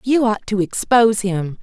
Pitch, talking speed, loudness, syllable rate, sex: 210 Hz, 185 wpm, -17 LUFS, 4.8 syllables/s, female